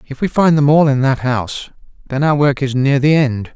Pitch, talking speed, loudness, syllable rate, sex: 140 Hz, 255 wpm, -14 LUFS, 5.3 syllables/s, male